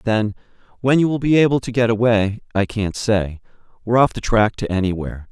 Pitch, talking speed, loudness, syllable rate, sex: 110 Hz, 205 wpm, -19 LUFS, 5.7 syllables/s, male